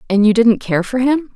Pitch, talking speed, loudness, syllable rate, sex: 230 Hz, 265 wpm, -15 LUFS, 5.1 syllables/s, female